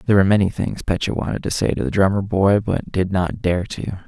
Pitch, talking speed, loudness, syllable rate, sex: 95 Hz, 250 wpm, -20 LUFS, 5.9 syllables/s, male